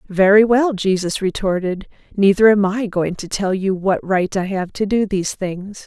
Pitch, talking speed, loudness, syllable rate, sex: 195 Hz, 195 wpm, -17 LUFS, 4.6 syllables/s, female